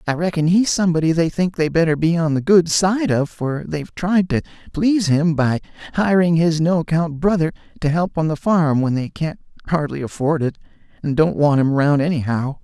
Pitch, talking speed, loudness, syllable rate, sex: 160 Hz, 205 wpm, -18 LUFS, 5.4 syllables/s, male